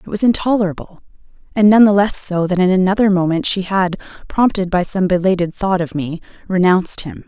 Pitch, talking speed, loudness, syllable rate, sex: 185 Hz, 190 wpm, -15 LUFS, 5.7 syllables/s, female